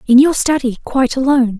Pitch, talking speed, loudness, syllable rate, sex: 260 Hz, 190 wpm, -14 LUFS, 6.6 syllables/s, female